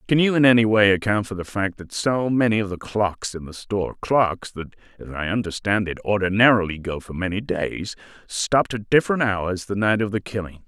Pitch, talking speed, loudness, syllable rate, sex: 105 Hz, 200 wpm, -21 LUFS, 5.4 syllables/s, male